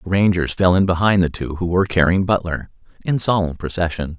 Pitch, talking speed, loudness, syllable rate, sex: 90 Hz, 200 wpm, -18 LUFS, 5.9 syllables/s, male